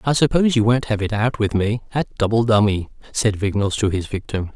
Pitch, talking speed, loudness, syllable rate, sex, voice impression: 110 Hz, 225 wpm, -20 LUFS, 5.9 syllables/s, male, masculine, adult-like, slightly thick, tensed, slightly powerful, slightly hard, clear, fluent, cool, intellectual, calm, slightly mature, slightly reassuring, wild, slightly lively, slightly kind